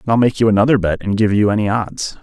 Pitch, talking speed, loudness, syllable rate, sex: 105 Hz, 295 wpm, -16 LUFS, 6.8 syllables/s, male